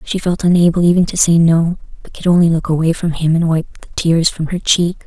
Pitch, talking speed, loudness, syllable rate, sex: 170 Hz, 250 wpm, -14 LUFS, 5.6 syllables/s, female